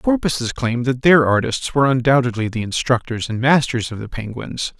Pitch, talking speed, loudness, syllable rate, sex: 125 Hz, 200 wpm, -18 LUFS, 5.7 syllables/s, male